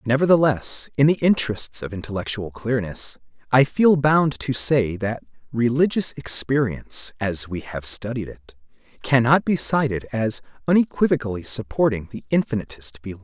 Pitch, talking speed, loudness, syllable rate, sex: 125 Hz, 130 wpm, -21 LUFS, 5.0 syllables/s, male